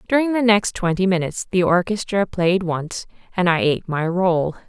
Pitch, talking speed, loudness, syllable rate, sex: 180 Hz, 180 wpm, -20 LUFS, 5.1 syllables/s, female